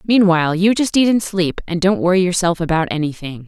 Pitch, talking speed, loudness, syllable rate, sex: 180 Hz, 205 wpm, -16 LUFS, 5.9 syllables/s, female